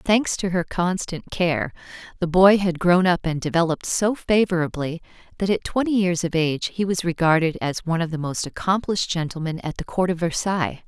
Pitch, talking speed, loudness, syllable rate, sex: 175 Hz, 195 wpm, -22 LUFS, 5.6 syllables/s, female